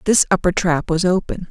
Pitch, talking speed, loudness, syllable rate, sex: 175 Hz, 200 wpm, -18 LUFS, 5.3 syllables/s, female